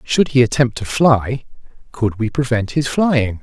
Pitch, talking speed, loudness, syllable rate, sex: 125 Hz, 175 wpm, -17 LUFS, 4.2 syllables/s, male